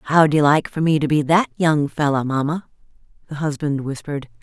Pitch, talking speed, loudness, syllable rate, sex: 150 Hz, 190 wpm, -19 LUFS, 5.3 syllables/s, female